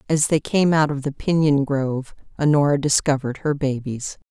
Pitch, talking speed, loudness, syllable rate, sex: 145 Hz, 165 wpm, -20 LUFS, 5.3 syllables/s, female